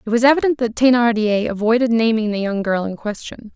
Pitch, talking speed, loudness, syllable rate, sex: 225 Hz, 200 wpm, -17 LUFS, 5.8 syllables/s, female